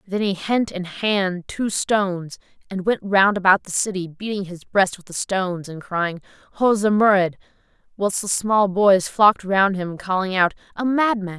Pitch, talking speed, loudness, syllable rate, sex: 195 Hz, 180 wpm, -20 LUFS, 4.5 syllables/s, female